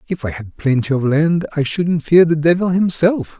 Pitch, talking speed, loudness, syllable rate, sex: 160 Hz, 210 wpm, -16 LUFS, 4.8 syllables/s, male